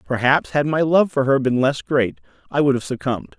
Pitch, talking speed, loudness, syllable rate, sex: 135 Hz, 230 wpm, -19 LUFS, 5.4 syllables/s, male